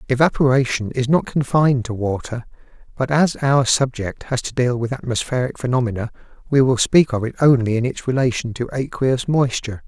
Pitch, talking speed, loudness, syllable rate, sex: 125 Hz, 170 wpm, -19 LUFS, 5.5 syllables/s, male